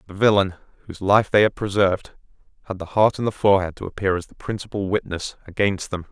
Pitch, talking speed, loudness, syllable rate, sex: 100 Hz, 205 wpm, -21 LUFS, 6.5 syllables/s, male